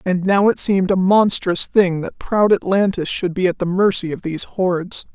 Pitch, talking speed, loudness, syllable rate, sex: 185 Hz, 210 wpm, -17 LUFS, 5.0 syllables/s, female